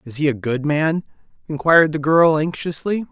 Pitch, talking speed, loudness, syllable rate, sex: 150 Hz, 175 wpm, -18 LUFS, 5.0 syllables/s, male